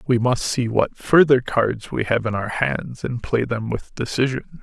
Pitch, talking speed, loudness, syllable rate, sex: 120 Hz, 210 wpm, -21 LUFS, 4.4 syllables/s, male